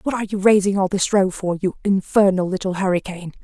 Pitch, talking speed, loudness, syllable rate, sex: 190 Hz, 210 wpm, -19 LUFS, 6.3 syllables/s, female